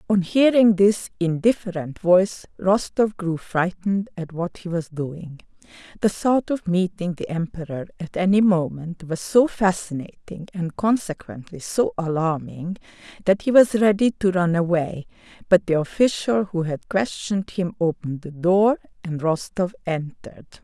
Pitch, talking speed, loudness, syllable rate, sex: 180 Hz, 140 wpm, -22 LUFS, 4.6 syllables/s, female